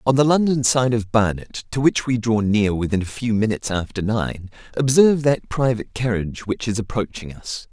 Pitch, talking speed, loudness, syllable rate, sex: 115 Hz, 195 wpm, -20 LUFS, 5.3 syllables/s, male